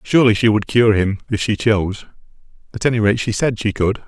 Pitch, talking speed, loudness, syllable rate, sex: 110 Hz, 205 wpm, -17 LUFS, 6.0 syllables/s, male